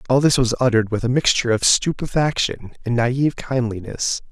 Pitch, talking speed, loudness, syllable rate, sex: 125 Hz, 165 wpm, -19 LUFS, 5.7 syllables/s, male